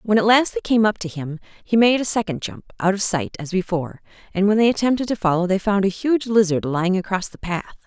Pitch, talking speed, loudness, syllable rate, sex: 200 Hz, 235 wpm, -20 LUFS, 6.1 syllables/s, female